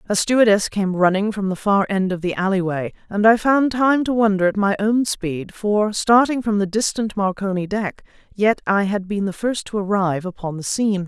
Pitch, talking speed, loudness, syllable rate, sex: 200 Hz, 210 wpm, -19 LUFS, 5.1 syllables/s, female